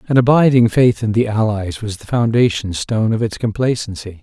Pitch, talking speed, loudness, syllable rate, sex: 110 Hz, 185 wpm, -16 LUFS, 5.5 syllables/s, male